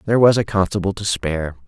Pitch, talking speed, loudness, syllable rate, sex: 95 Hz, 215 wpm, -19 LUFS, 6.9 syllables/s, male